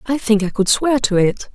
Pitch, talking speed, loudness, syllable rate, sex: 225 Hz, 270 wpm, -16 LUFS, 5.0 syllables/s, female